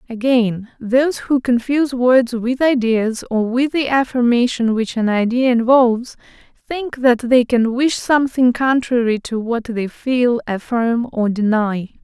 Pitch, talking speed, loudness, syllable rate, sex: 240 Hz, 145 wpm, -17 LUFS, 4.2 syllables/s, female